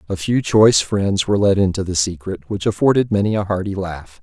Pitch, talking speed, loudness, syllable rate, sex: 100 Hz, 215 wpm, -18 LUFS, 5.7 syllables/s, male